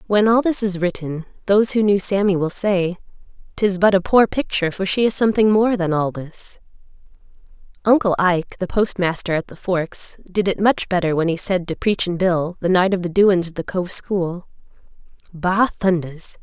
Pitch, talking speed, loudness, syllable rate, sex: 190 Hz, 190 wpm, -19 LUFS, 5.0 syllables/s, female